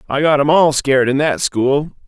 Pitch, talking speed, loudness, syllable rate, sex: 140 Hz, 230 wpm, -15 LUFS, 5.1 syllables/s, male